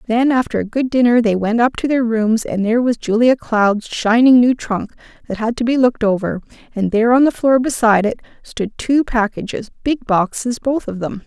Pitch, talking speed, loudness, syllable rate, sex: 235 Hz, 215 wpm, -16 LUFS, 5.3 syllables/s, female